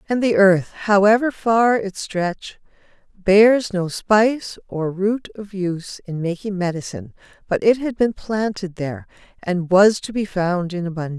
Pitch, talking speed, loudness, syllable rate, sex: 195 Hz, 160 wpm, -19 LUFS, 4.6 syllables/s, female